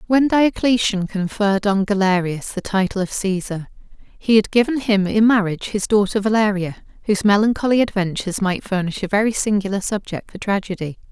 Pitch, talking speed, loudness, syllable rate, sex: 205 Hz, 155 wpm, -19 LUFS, 5.6 syllables/s, female